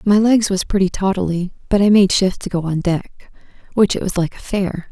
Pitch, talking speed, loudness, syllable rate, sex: 190 Hz, 230 wpm, -17 LUFS, 5.0 syllables/s, female